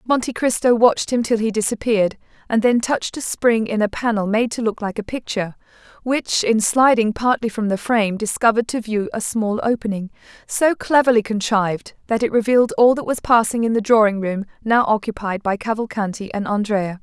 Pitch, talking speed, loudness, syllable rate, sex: 220 Hz, 190 wpm, -19 LUFS, 5.6 syllables/s, female